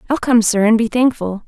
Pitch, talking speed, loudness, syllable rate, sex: 225 Hz, 245 wpm, -15 LUFS, 5.6 syllables/s, female